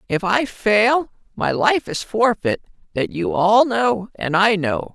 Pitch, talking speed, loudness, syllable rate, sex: 195 Hz, 160 wpm, -19 LUFS, 3.6 syllables/s, male